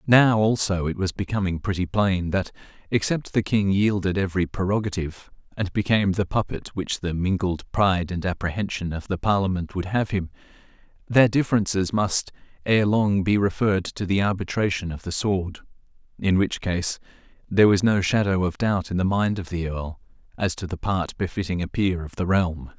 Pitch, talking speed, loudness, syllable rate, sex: 95 Hz, 180 wpm, -23 LUFS, 5.2 syllables/s, male